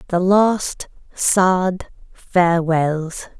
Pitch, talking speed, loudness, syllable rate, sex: 180 Hz, 70 wpm, -17 LUFS, 2.3 syllables/s, female